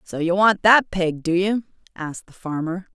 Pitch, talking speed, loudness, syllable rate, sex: 185 Hz, 205 wpm, -20 LUFS, 4.9 syllables/s, female